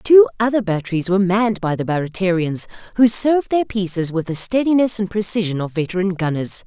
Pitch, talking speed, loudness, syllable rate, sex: 195 Hz, 180 wpm, -18 LUFS, 6.0 syllables/s, female